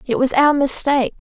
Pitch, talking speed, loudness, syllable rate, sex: 270 Hz, 175 wpm, -17 LUFS, 5.7 syllables/s, female